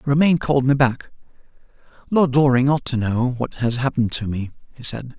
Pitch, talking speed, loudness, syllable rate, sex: 130 Hz, 185 wpm, -19 LUFS, 5.8 syllables/s, male